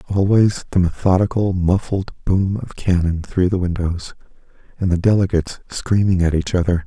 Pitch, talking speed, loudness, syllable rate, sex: 90 Hz, 150 wpm, -18 LUFS, 5.0 syllables/s, male